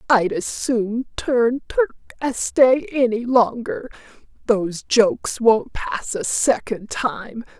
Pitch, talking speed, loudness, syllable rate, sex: 235 Hz, 125 wpm, -20 LUFS, 3.3 syllables/s, female